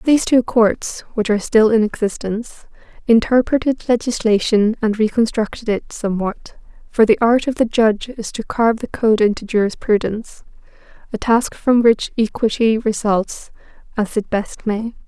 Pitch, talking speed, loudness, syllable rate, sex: 220 Hz, 145 wpm, -17 LUFS, 4.9 syllables/s, female